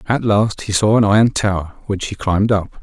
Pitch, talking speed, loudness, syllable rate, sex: 100 Hz, 235 wpm, -16 LUFS, 5.4 syllables/s, male